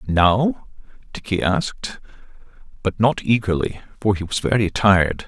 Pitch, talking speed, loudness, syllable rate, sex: 105 Hz, 125 wpm, -20 LUFS, 4.6 syllables/s, male